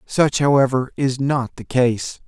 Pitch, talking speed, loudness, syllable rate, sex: 130 Hz, 160 wpm, -19 LUFS, 4.0 syllables/s, male